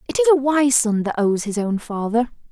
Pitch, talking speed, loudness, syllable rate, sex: 245 Hz, 240 wpm, -19 LUFS, 5.4 syllables/s, female